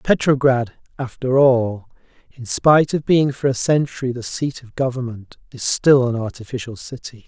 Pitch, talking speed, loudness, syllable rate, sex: 125 Hz, 155 wpm, -19 LUFS, 4.8 syllables/s, male